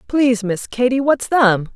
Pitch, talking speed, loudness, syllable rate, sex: 240 Hz, 170 wpm, -16 LUFS, 4.4 syllables/s, female